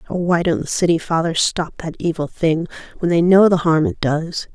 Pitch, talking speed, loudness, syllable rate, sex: 170 Hz, 225 wpm, -18 LUFS, 5.0 syllables/s, female